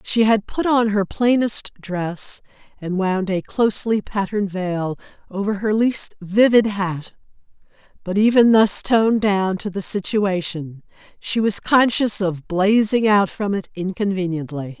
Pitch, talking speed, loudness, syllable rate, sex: 200 Hz, 140 wpm, -19 LUFS, 4.1 syllables/s, female